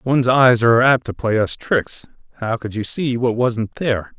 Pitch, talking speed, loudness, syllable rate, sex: 120 Hz, 200 wpm, -17 LUFS, 4.8 syllables/s, male